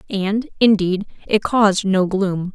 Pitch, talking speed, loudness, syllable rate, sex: 200 Hz, 140 wpm, -18 LUFS, 3.9 syllables/s, female